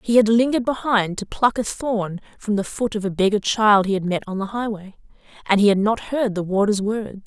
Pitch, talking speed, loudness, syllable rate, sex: 210 Hz, 240 wpm, -20 LUFS, 5.4 syllables/s, female